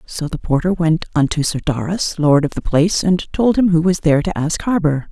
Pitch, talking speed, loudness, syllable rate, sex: 165 Hz, 235 wpm, -17 LUFS, 5.3 syllables/s, female